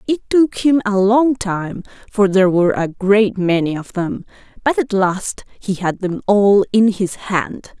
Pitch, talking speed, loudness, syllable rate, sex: 205 Hz, 185 wpm, -16 LUFS, 4.0 syllables/s, female